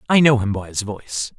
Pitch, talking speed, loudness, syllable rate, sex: 110 Hz, 260 wpm, -19 LUFS, 5.9 syllables/s, male